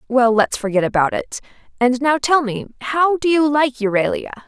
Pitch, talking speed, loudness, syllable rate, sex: 255 Hz, 190 wpm, -17 LUFS, 5.2 syllables/s, female